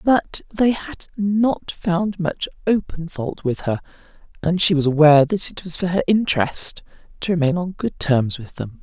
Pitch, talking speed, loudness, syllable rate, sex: 175 Hz, 185 wpm, -20 LUFS, 4.5 syllables/s, female